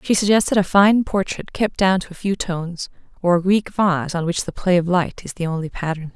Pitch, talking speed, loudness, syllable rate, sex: 185 Hz, 245 wpm, -19 LUFS, 5.4 syllables/s, female